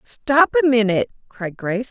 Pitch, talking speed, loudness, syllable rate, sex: 230 Hz, 160 wpm, -18 LUFS, 5.2 syllables/s, female